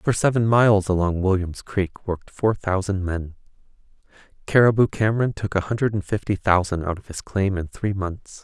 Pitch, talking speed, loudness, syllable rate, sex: 100 Hz, 180 wpm, -22 LUFS, 5.2 syllables/s, male